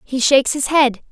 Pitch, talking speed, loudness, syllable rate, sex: 265 Hz, 215 wpm, -15 LUFS, 5.2 syllables/s, female